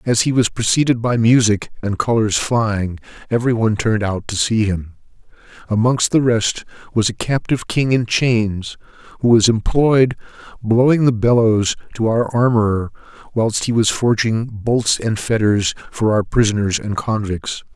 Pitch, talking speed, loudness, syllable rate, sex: 115 Hz, 155 wpm, -17 LUFS, 4.7 syllables/s, male